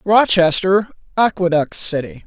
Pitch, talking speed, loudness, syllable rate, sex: 180 Hz, 80 wpm, -16 LUFS, 4.2 syllables/s, male